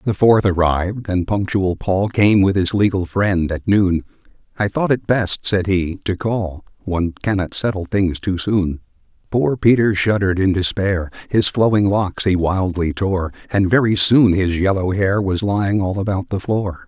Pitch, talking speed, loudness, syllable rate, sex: 95 Hz, 180 wpm, -18 LUFS, 4.4 syllables/s, male